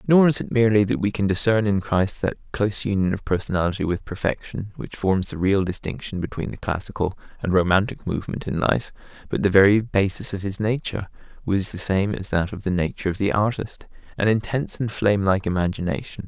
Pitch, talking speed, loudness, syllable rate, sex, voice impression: 100 Hz, 190 wpm, -22 LUFS, 6.1 syllables/s, male, masculine, adult-like, slightly dark, sincere, slightly calm, slightly friendly